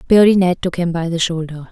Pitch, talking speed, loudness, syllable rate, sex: 175 Hz, 245 wpm, -16 LUFS, 5.8 syllables/s, female